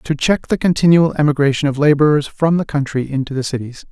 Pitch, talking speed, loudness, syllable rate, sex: 145 Hz, 200 wpm, -16 LUFS, 6.0 syllables/s, male